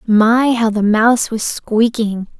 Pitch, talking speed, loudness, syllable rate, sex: 225 Hz, 150 wpm, -14 LUFS, 3.7 syllables/s, female